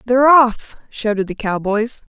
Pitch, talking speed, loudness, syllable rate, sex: 230 Hz, 140 wpm, -16 LUFS, 4.4 syllables/s, female